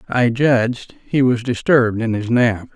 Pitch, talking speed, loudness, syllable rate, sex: 120 Hz, 175 wpm, -17 LUFS, 4.4 syllables/s, male